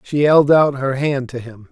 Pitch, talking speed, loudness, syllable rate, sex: 135 Hz, 245 wpm, -15 LUFS, 4.4 syllables/s, male